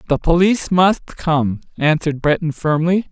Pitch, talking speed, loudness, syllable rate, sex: 160 Hz, 135 wpm, -17 LUFS, 4.7 syllables/s, male